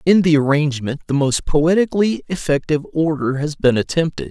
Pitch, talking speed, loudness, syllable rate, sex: 155 Hz, 155 wpm, -18 LUFS, 5.6 syllables/s, male